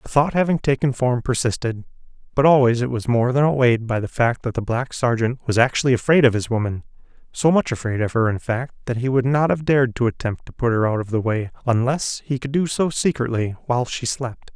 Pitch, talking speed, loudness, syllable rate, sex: 125 Hz, 235 wpm, -20 LUFS, 5.8 syllables/s, male